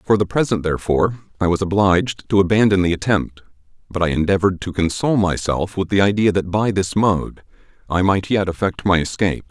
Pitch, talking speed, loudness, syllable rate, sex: 95 Hz, 190 wpm, -18 LUFS, 6.0 syllables/s, male